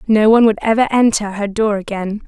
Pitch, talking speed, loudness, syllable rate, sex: 215 Hz, 210 wpm, -15 LUFS, 5.9 syllables/s, female